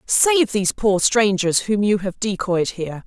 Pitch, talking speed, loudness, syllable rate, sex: 205 Hz, 175 wpm, -19 LUFS, 4.4 syllables/s, female